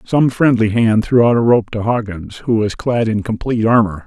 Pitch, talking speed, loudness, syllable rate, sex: 115 Hz, 220 wpm, -15 LUFS, 5.1 syllables/s, male